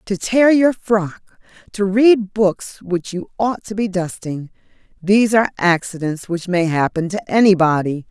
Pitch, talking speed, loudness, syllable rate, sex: 195 Hz, 155 wpm, -17 LUFS, 4.3 syllables/s, female